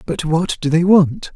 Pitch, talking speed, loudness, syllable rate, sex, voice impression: 165 Hz, 220 wpm, -15 LUFS, 4.3 syllables/s, male, masculine, adult-like, slightly tensed, slightly powerful, clear, slightly raspy, friendly, reassuring, wild, kind, slightly modest